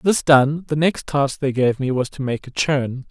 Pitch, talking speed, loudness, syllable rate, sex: 140 Hz, 250 wpm, -19 LUFS, 4.4 syllables/s, male